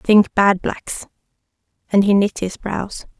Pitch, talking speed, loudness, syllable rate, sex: 200 Hz, 150 wpm, -18 LUFS, 3.6 syllables/s, female